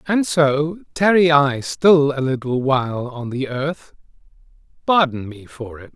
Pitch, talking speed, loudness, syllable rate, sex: 145 Hz, 140 wpm, -18 LUFS, 4.0 syllables/s, male